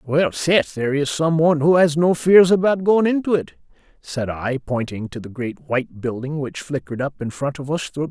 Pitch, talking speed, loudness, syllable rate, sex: 150 Hz, 235 wpm, -19 LUFS, 5.3 syllables/s, male